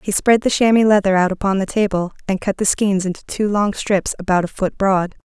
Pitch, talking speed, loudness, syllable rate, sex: 195 Hz, 240 wpm, -17 LUFS, 5.5 syllables/s, female